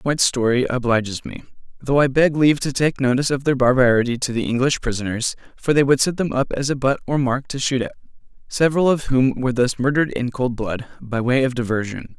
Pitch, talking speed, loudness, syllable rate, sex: 130 Hz, 220 wpm, -20 LUFS, 6.0 syllables/s, male